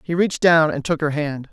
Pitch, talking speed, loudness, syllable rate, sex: 155 Hz, 275 wpm, -19 LUFS, 5.7 syllables/s, male